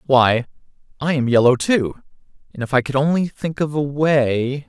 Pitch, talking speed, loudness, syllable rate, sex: 140 Hz, 180 wpm, -18 LUFS, 4.6 syllables/s, male